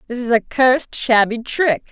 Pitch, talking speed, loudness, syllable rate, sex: 240 Hz, 190 wpm, -16 LUFS, 4.8 syllables/s, female